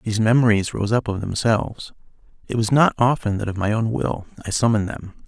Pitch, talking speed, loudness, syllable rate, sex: 110 Hz, 205 wpm, -20 LUFS, 6.1 syllables/s, male